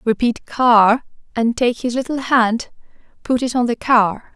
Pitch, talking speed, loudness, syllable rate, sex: 235 Hz, 165 wpm, -17 LUFS, 4.1 syllables/s, female